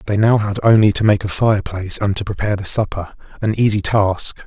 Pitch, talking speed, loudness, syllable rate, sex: 100 Hz, 200 wpm, -16 LUFS, 6.1 syllables/s, male